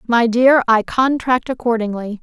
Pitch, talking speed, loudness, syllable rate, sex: 235 Hz, 135 wpm, -16 LUFS, 4.4 syllables/s, female